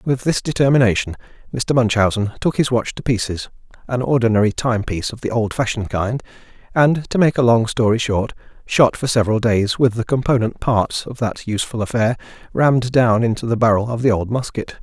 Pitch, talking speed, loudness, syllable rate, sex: 115 Hz, 185 wpm, -18 LUFS, 5.7 syllables/s, male